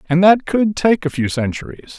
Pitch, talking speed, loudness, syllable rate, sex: 170 Hz, 210 wpm, -16 LUFS, 5.0 syllables/s, male